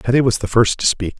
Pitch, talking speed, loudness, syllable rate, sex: 115 Hz, 300 wpm, -16 LUFS, 6.1 syllables/s, male